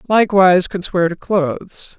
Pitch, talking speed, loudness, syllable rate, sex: 190 Hz, 150 wpm, -15 LUFS, 5.0 syllables/s, female